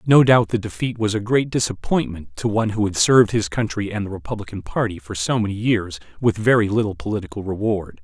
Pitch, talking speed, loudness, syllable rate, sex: 105 Hz, 210 wpm, -20 LUFS, 6.0 syllables/s, male